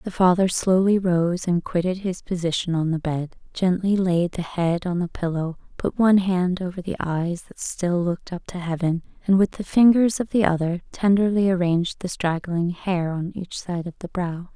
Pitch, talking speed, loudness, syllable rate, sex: 180 Hz, 200 wpm, -22 LUFS, 4.8 syllables/s, female